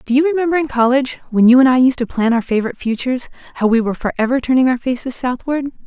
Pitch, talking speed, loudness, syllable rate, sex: 255 Hz, 235 wpm, -16 LUFS, 7.3 syllables/s, female